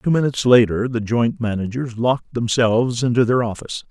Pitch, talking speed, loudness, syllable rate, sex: 120 Hz, 170 wpm, -19 LUFS, 5.7 syllables/s, male